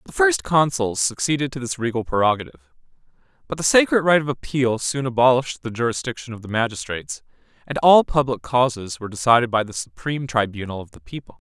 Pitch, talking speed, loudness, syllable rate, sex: 120 Hz, 180 wpm, -20 LUFS, 6.2 syllables/s, male